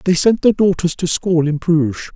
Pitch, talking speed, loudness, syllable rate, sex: 175 Hz, 225 wpm, -16 LUFS, 5.0 syllables/s, male